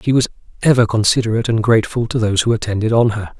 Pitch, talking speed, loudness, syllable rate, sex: 115 Hz, 210 wpm, -16 LUFS, 7.3 syllables/s, male